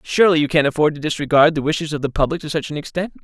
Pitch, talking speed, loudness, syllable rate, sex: 155 Hz, 280 wpm, -18 LUFS, 7.5 syllables/s, male